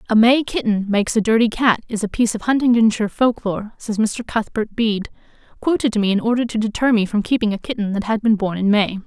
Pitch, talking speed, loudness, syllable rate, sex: 220 Hz, 240 wpm, -19 LUFS, 6.2 syllables/s, female